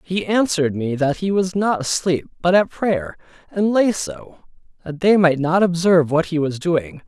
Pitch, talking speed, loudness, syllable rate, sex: 170 Hz, 195 wpm, -19 LUFS, 4.5 syllables/s, male